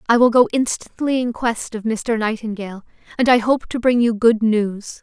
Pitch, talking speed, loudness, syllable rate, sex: 230 Hz, 205 wpm, -18 LUFS, 4.9 syllables/s, female